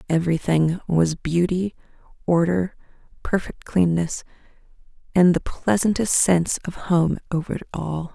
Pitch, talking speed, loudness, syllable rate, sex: 170 Hz, 110 wpm, -22 LUFS, 4.5 syllables/s, female